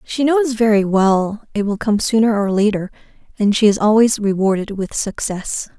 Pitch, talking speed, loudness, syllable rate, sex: 210 Hz, 175 wpm, -17 LUFS, 4.7 syllables/s, female